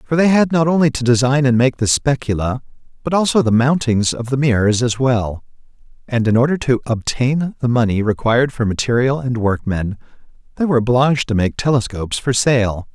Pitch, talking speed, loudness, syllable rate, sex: 125 Hz, 185 wpm, -16 LUFS, 5.5 syllables/s, male